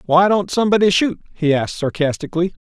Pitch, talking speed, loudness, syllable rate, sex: 175 Hz, 160 wpm, -17 LUFS, 6.7 syllables/s, male